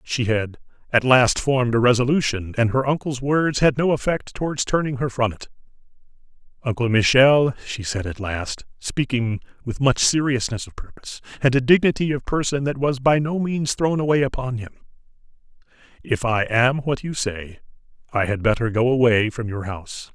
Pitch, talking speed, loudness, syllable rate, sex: 125 Hz, 175 wpm, -21 LUFS, 5.1 syllables/s, male